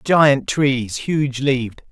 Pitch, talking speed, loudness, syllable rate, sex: 135 Hz, 125 wpm, -18 LUFS, 2.8 syllables/s, male